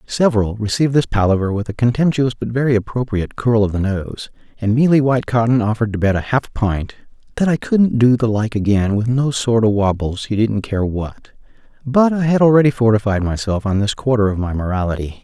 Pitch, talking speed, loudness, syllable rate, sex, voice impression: 115 Hz, 200 wpm, -17 LUFS, 5.7 syllables/s, male, very masculine, very middle-aged, very thick, slightly relaxed, weak, slightly bright, very soft, muffled, slightly fluent, very cool, very intellectual, refreshing, very sincere, very calm, very mature, very friendly, very reassuring, very unique, elegant, slightly wild, sweet, lively, kind, slightly modest